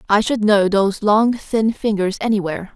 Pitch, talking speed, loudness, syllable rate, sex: 210 Hz, 175 wpm, -17 LUFS, 5.1 syllables/s, female